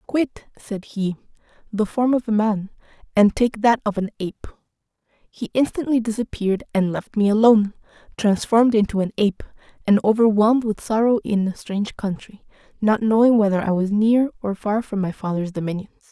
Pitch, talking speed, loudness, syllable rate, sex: 215 Hz, 170 wpm, -20 LUFS, 5.4 syllables/s, female